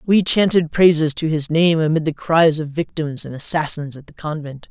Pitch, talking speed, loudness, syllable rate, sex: 155 Hz, 205 wpm, -18 LUFS, 5.0 syllables/s, female